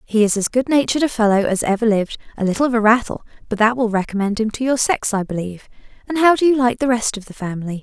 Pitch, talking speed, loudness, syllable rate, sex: 225 Hz, 260 wpm, -18 LUFS, 7.0 syllables/s, female